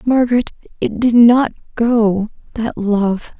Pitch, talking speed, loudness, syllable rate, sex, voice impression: 225 Hz, 105 wpm, -15 LUFS, 3.6 syllables/s, female, feminine, adult-like, relaxed, weak, soft, slightly raspy, calm, reassuring, elegant, kind, modest